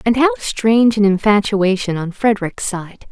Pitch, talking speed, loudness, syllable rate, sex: 205 Hz, 155 wpm, -16 LUFS, 4.8 syllables/s, female